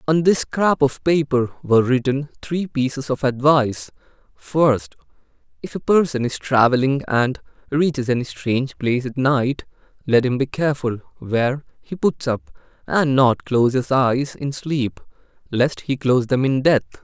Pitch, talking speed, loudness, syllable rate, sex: 135 Hz, 155 wpm, -20 LUFS, 4.7 syllables/s, male